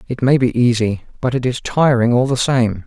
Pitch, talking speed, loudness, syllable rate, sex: 125 Hz, 230 wpm, -16 LUFS, 5.1 syllables/s, male